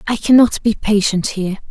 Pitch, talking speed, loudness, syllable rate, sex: 210 Hz, 175 wpm, -15 LUFS, 5.6 syllables/s, female